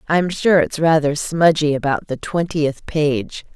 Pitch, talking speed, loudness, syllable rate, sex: 155 Hz, 150 wpm, -18 LUFS, 3.9 syllables/s, female